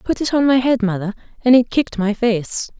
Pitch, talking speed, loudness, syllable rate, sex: 230 Hz, 235 wpm, -17 LUFS, 5.4 syllables/s, female